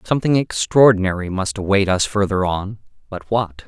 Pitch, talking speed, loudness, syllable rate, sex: 100 Hz, 145 wpm, -18 LUFS, 5.3 syllables/s, male